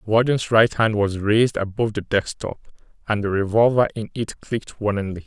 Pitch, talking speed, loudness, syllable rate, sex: 105 Hz, 195 wpm, -21 LUFS, 5.5 syllables/s, male